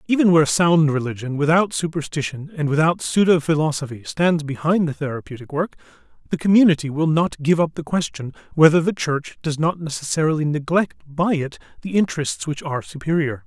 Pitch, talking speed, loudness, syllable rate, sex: 155 Hz, 160 wpm, -20 LUFS, 5.7 syllables/s, male